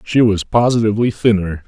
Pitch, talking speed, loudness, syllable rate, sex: 110 Hz, 145 wpm, -15 LUFS, 5.7 syllables/s, male